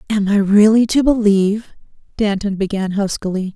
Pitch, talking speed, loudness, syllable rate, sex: 205 Hz, 135 wpm, -16 LUFS, 5.1 syllables/s, female